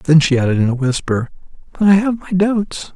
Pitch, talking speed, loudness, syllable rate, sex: 165 Hz, 225 wpm, -16 LUFS, 5.3 syllables/s, male